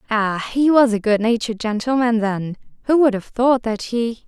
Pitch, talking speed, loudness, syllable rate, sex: 230 Hz, 170 wpm, -18 LUFS, 4.9 syllables/s, female